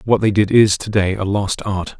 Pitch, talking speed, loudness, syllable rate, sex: 100 Hz, 270 wpm, -17 LUFS, 4.8 syllables/s, male